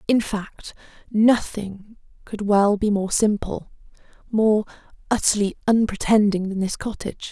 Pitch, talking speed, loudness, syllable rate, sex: 210 Hz, 105 wpm, -21 LUFS, 4.3 syllables/s, female